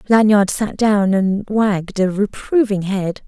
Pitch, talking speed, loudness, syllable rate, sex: 205 Hz, 145 wpm, -17 LUFS, 3.9 syllables/s, female